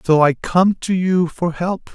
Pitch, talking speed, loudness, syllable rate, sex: 170 Hz, 215 wpm, -17 LUFS, 3.8 syllables/s, male